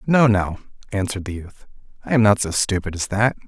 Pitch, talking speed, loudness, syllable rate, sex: 100 Hz, 205 wpm, -20 LUFS, 5.8 syllables/s, male